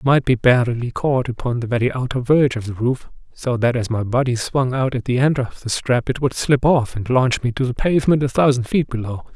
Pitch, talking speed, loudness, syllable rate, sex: 125 Hz, 255 wpm, -19 LUFS, 5.7 syllables/s, male